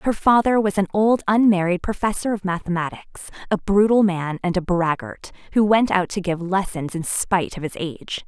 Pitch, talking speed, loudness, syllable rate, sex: 190 Hz, 190 wpm, -20 LUFS, 5.3 syllables/s, female